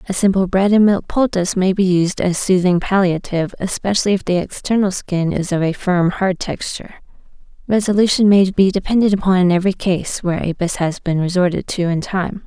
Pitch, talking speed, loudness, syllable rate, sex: 185 Hz, 190 wpm, -17 LUFS, 5.6 syllables/s, female